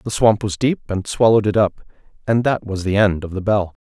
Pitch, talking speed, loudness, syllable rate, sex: 105 Hz, 235 wpm, -18 LUFS, 5.7 syllables/s, male